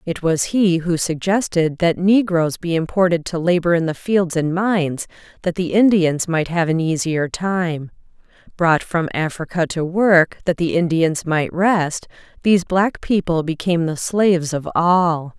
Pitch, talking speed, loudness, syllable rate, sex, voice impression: 170 Hz, 165 wpm, -18 LUFS, 4.3 syllables/s, female, very feminine, slightly middle-aged, thin, tensed, powerful, bright, slightly hard, very clear, fluent, cool, intellectual, very refreshing, sincere, calm, friendly, reassuring, unique, very elegant, slightly wild, sweet, slightly lively, very kind, slightly intense, slightly modest